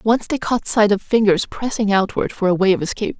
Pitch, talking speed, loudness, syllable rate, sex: 210 Hz, 245 wpm, -18 LUFS, 5.7 syllables/s, female